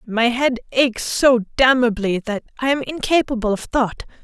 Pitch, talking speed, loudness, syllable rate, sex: 245 Hz, 155 wpm, -19 LUFS, 4.6 syllables/s, female